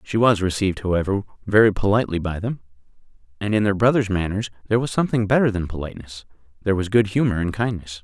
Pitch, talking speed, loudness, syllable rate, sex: 100 Hz, 185 wpm, -21 LUFS, 7.1 syllables/s, male